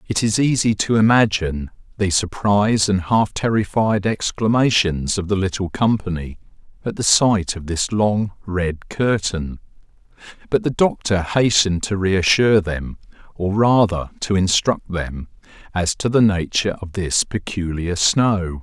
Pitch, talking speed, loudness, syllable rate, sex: 100 Hz, 140 wpm, -19 LUFS, 4.4 syllables/s, male